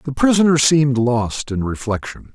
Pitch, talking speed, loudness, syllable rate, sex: 135 Hz, 155 wpm, -17 LUFS, 4.8 syllables/s, male